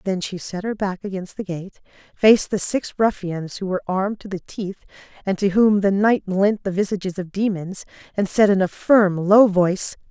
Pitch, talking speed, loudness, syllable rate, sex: 195 Hz, 210 wpm, -20 LUFS, 5.1 syllables/s, female